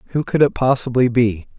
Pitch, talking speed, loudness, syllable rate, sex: 125 Hz, 190 wpm, -17 LUFS, 5.7 syllables/s, male